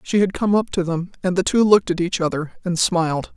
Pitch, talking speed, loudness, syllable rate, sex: 180 Hz, 270 wpm, -20 LUFS, 5.9 syllables/s, female